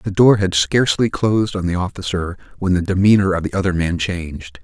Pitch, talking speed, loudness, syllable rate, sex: 90 Hz, 205 wpm, -17 LUFS, 5.7 syllables/s, male